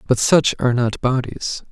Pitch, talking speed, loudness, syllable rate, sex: 125 Hz, 175 wpm, -18 LUFS, 4.8 syllables/s, male